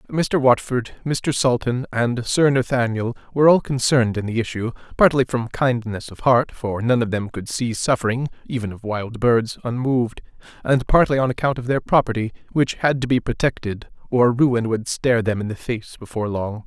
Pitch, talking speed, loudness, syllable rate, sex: 120 Hz, 180 wpm, -20 LUFS, 5.1 syllables/s, male